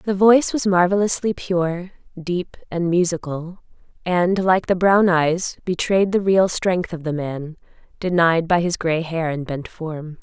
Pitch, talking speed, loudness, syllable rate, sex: 175 Hz, 165 wpm, -20 LUFS, 4.1 syllables/s, female